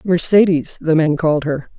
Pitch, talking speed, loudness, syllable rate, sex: 160 Hz, 170 wpm, -16 LUFS, 5.0 syllables/s, female